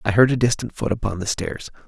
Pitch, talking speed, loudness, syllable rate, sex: 110 Hz, 255 wpm, -21 LUFS, 6.1 syllables/s, male